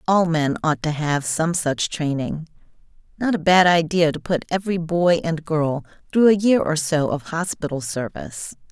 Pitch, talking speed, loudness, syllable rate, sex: 165 Hz, 180 wpm, -21 LUFS, 4.7 syllables/s, female